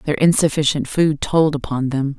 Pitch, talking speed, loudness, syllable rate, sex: 145 Hz, 165 wpm, -18 LUFS, 4.7 syllables/s, female